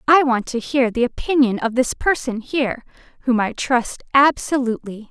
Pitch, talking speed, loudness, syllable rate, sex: 250 Hz, 165 wpm, -19 LUFS, 5.0 syllables/s, female